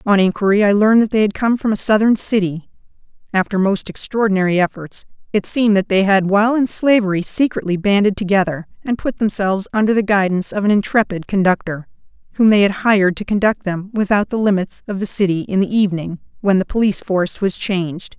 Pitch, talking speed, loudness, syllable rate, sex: 200 Hz, 195 wpm, -16 LUFS, 6.1 syllables/s, female